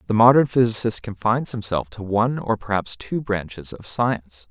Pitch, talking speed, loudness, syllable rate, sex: 110 Hz, 175 wpm, -21 LUFS, 5.3 syllables/s, male